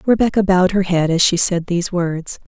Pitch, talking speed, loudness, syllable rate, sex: 180 Hz, 210 wpm, -16 LUFS, 5.6 syllables/s, female